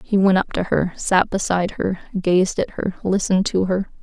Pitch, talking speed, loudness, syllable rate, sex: 190 Hz, 210 wpm, -20 LUFS, 5.1 syllables/s, female